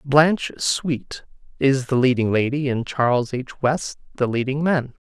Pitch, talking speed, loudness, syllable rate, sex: 135 Hz, 155 wpm, -21 LUFS, 4.2 syllables/s, male